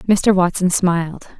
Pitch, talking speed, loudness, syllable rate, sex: 180 Hz, 130 wpm, -16 LUFS, 4.0 syllables/s, female